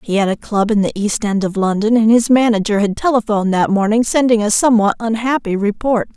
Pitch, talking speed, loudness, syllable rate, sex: 215 Hz, 215 wpm, -15 LUFS, 5.9 syllables/s, female